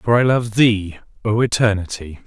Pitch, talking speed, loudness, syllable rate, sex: 110 Hz, 160 wpm, -18 LUFS, 4.6 syllables/s, male